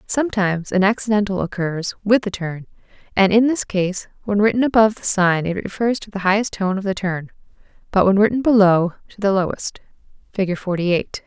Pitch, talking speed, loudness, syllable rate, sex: 200 Hz, 185 wpm, -19 LUFS, 5.5 syllables/s, female